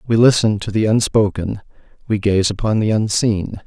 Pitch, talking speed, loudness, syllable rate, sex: 105 Hz, 165 wpm, -17 LUFS, 4.9 syllables/s, male